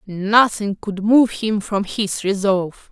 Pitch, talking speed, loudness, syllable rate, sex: 205 Hz, 145 wpm, -18 LUFS, 3.6 syllables/s, female